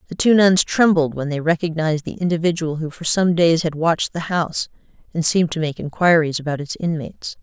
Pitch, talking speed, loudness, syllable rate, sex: 165 Hz, 200 wpm, -19 LUFS, 5.9 syllables/s, female